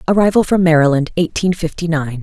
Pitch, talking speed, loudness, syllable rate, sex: 165 Hz, 160 wpm, -15 LUFS, 5.9 syllables/s, female